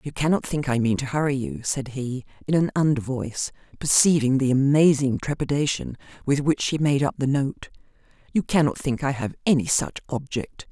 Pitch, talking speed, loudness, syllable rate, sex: 135 Hz, 180 wpm, -23 LUFS, 5.4 syllables/s, female